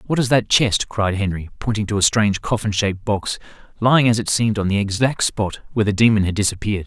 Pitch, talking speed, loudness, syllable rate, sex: 105 Hz, 225 wpm, -19 LUFS, 6.4 syllables/s, male